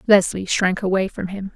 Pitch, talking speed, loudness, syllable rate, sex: 190 Hz, 195 wpm, -20 LUFS, 5.0 syllables/s, female